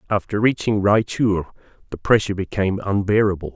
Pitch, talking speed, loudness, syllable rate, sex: 100 Hz, 120 wpm, -20 LUFS, 5.9 syllables/s, male